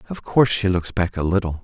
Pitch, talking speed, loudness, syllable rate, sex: 100 Hz, 255 wpm, -20 LUFS, 6.3 syllables/s, male